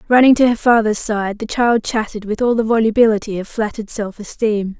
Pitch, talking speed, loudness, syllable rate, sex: 220 Hz, 200 wpm, -16 LUFS, 5.9 syllables/s, female